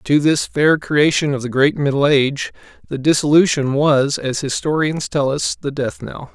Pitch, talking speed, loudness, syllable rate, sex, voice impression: 145 Hz, 180 wpm, -17 LUFS, 4.6 syllables/s, male, masculine, adult-like, slightly muffled, cool, slightly intellectual, sincere